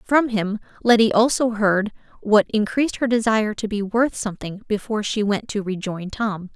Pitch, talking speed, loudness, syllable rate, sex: 215 Hz, 175 wpm, -21 LUFS, 5.2 syllables/s, female